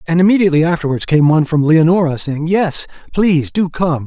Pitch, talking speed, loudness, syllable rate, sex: 165 Hz, 175 wpm, -14 LUFS, 6.0 syllables/s, male